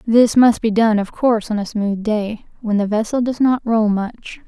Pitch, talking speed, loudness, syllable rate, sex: 220 Hz, 230 wpm, -17 LUFS, 4.6 syllables/s, female